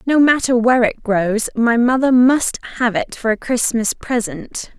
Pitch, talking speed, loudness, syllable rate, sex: 240 Hz, 175 wpm, -16 LUFS, 4.4 syllables/s, female